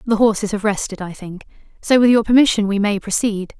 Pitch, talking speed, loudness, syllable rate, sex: 210 Hz, 215 wpm, -17 LUFS, 5.8 syllables/s, female